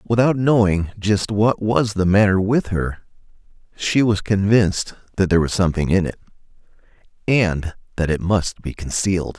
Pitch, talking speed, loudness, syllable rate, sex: 100 Hz, 155 wpm, -19 LUFS, 4.9 syllables/s, male